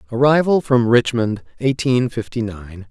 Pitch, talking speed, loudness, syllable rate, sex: 120 Hz, 125 wpm, -18 LUFS, 4.4 syllables/s, male